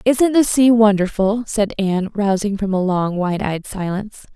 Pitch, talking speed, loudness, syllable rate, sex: 205 Hz, 180 wpm, -17 LUFS, 4.7 syllables/s, female